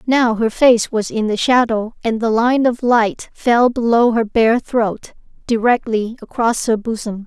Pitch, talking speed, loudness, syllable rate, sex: 230 Hz, 175 wpm, -16 LUFS, 4.1 syllables/s, female